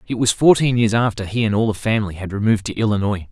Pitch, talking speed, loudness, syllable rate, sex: 110 Hz, 255 wpm, -18 LUFS, 7.0 syllables/s, male